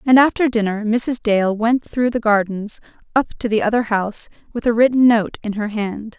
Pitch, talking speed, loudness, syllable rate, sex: 225 Hz, 205 wpm, -18 LUFS, 5.1 syllables/s, female